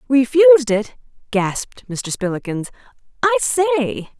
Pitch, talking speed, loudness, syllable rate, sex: 230 Hz, 100 wpm, -17 LUFS, 4.0 syllables/s, female